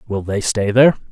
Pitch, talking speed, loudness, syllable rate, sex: 110 Hz, 215 wpm, -16 LUFS, 6.0 syllables/s, male